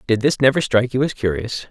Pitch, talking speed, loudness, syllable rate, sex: 120 Hz, 245 wpm, -18 LUFS, 6.4 syllables/s, male